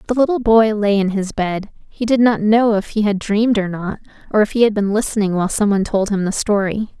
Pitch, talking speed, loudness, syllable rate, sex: 210 Hz, 250 wpm, -17 LUFS, 5.9 syllables/s, female